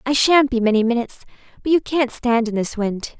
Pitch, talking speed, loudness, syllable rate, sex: 245 Hz, 225 wpm, -18 LUFS, 5.7 syllables/s, female